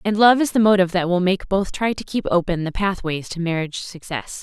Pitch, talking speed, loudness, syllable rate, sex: 185 Hz, 245 wpm, -20 LUFS, 5.8 syllables/s, female